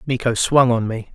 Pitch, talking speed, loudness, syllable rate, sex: 120 Hz, 210 wpm, -18 LUFS, 5.0 syllables/s, male